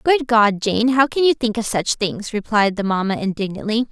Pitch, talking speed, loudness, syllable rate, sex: 225 Hz, 215 wpm, -18 LUFS, 5.0 syllables/s, female